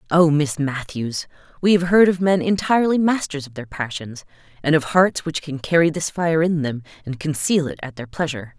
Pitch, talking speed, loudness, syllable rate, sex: 155 Hz, 205 wpm, -20 LUFS, 5.2 syllables/s, female